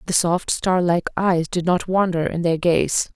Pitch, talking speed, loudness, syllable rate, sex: 175 Hz, 205 wpm, -20 LUFS, 4.1 syllables/s, female